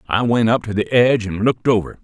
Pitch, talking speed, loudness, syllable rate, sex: 110 Hz, 265 wpm, -17 LUFS, 6.5 syllables/s, male